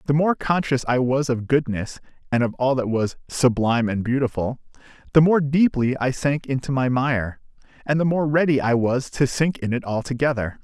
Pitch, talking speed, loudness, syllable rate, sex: 130 Hz, 190 wpm, -21 LUFS, 5.1 syllables/s, male